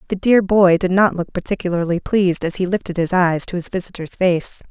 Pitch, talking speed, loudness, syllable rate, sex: 185 Hz, 215 wpm, -18 LUFS, 5.7 syllables/s, female